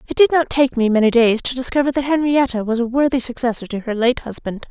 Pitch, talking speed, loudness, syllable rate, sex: 250 Hz, 240 wpm, -18 LUFS, 6.2 syllables/s, female